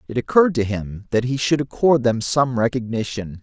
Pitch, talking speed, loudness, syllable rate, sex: 125 Hz, 190 wpm, -20 LUFS, 5.3 syllables/s, male